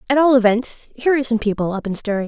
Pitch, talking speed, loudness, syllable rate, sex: 235 Hz, 265 wpm, -18 LUFS, 7.2 syllables/s, female